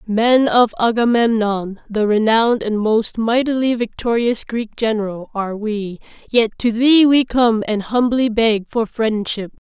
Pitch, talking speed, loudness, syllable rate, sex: 225 Hz, 145 wpm, -17 LUFS, 4.2 syllables/s, female